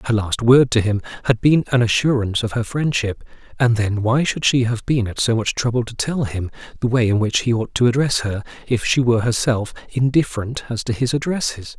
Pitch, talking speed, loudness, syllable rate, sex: 120 Hz, 225 wpm, -19 LUFS, 5.6 syllables/s, male